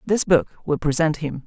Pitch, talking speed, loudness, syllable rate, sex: 155 Hz, 205 wpm, -21 LUFS, 5.1 syllables/s, male